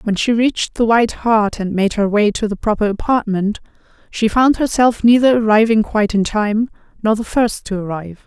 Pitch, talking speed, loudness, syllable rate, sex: 215 Hz, 195 wpm, -16 LUFS, 5.3 syllables/s, female